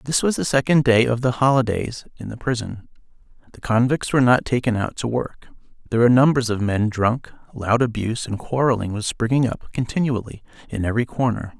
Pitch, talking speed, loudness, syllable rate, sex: 120 Hz, 185 wpm, -20 LUFS, 5.8 syllables/s, male